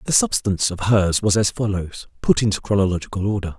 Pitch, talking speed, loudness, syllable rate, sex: 100 Hz, 185 wpm, -20 LUFS, 6.1 syllables/s, male